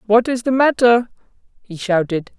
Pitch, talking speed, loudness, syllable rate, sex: 225 Hz, 150 wpm, -16 LUFS, 4.8 syllables/s, female